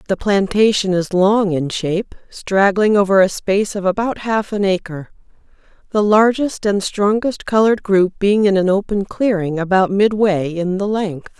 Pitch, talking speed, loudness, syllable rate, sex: 200 Hz, 165 wpm, -16 LUFS, 4.6 syllables/s, female